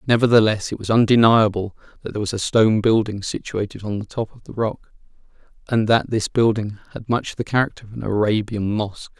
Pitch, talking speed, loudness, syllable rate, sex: 110 Hz, 190 wpm, -20 LUFS, 5.8 syllables/s, male